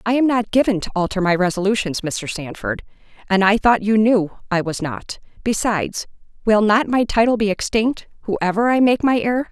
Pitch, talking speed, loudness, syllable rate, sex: 210 Hz, 190 wpm, -18 LUFS, 5.2 syllables/s, female